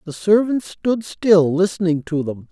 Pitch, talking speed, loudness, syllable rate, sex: 180 Hz, 165 wpm, -18 LUFS, 4.2 syllables/s, male